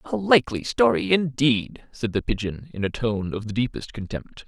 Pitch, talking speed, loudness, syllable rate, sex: 120 Hz, 190 wpm, -24 LUFS, 4.9 syllables/s, male